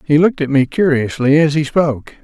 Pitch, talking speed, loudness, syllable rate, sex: 150 Hz, 215 wpm, -14 LUFS, 5.8 syllables/s, male